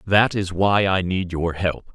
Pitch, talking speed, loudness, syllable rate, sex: 95 Hz, 215 wpm, -21 LUFS, 3.9 syllables/s, male